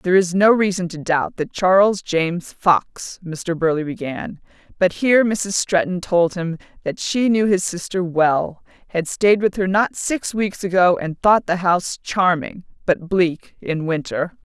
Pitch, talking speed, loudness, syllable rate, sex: 180 Hz, 175 wpm, -19 LUFS, 4.2 syllables/s, female